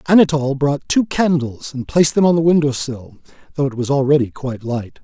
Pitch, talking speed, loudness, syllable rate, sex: 140 Hz, 205 wpm, -17 LUFS, 6.0 syllables/s, male